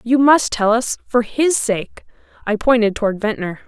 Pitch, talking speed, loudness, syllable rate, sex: 230 Hz, 165 wpm, -17 LUFS, 4.6 syllables/s, female